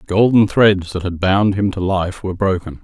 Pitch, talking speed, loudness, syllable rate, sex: 95 Hz, 235 wpm, -16 LUFS, 5.0 syllables/s, male